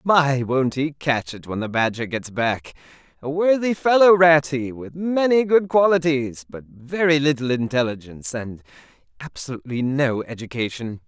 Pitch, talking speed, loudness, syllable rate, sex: 140 Hz, 140 wpm, -20 LUFS, 4.7 syllables/s, male